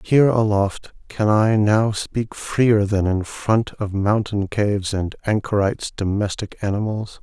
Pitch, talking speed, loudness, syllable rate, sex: 105 Hz, 140 wpm, -20 LUFS, 4.1 syllables/s, male